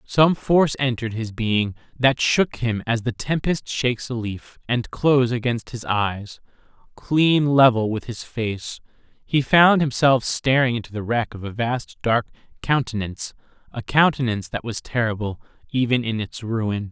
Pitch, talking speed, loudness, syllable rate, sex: 120 Hz, 155 wpm, -21 LUFS, 4.5 syllables/s, male